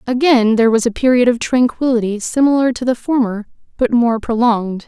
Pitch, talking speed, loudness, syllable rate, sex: 240 Hz, 170 wpm, -15 LUFS, 5.6 syllables/s, female